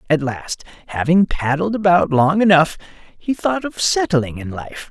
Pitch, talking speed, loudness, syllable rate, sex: 165 Hz, 160 wpm, -17 LUFS, 4.4 syllables/s, male